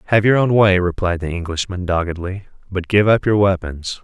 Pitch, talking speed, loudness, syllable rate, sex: 95 Hz, 195 wpm, -17 LUFS, 5.3 syllables/s, male